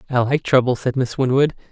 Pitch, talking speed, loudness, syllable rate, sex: 130 Hz, 210 wpm, -18 LUFS, 5.8 syllables/s, male